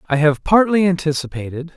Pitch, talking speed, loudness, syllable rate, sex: 160 Hz, 135 wpm, -17 LUFS, 5.6 syllables/s, male